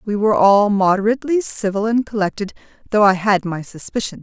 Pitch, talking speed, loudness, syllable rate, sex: 205 Hz, 170 wpm, -17 LUFS, 5.9 syllables/s, female